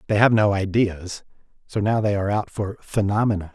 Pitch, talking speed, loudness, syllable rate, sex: 100 Hz, 185 wpm, -22 LUFS, 5.5 syllables/s, male